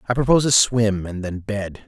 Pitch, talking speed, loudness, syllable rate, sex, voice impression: 110 Hz, 225 wpm, -19 LUFS, 5.3 syllables/s, male, very masculine, very adult-like, refreshing